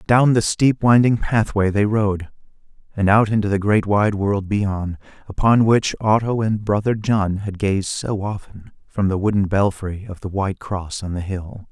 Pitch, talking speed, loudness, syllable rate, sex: 100 Hz, 185 wpm, -19 LUFS, 4.4 syllables/s, male